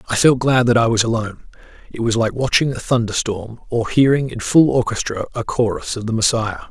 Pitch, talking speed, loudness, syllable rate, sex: 115 Hz, 205 wpm, -18 LUFS, 5.6 syllables/s, male